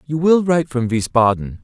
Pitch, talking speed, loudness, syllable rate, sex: 135 Hz, 185 wpm, -17 LUFS, 5.4 syllables/s, male